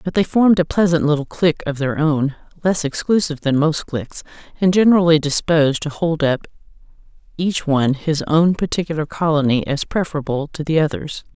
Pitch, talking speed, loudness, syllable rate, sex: 155 Hz, 170 wpm, -18 LUFS, 5.7 syllables/s, female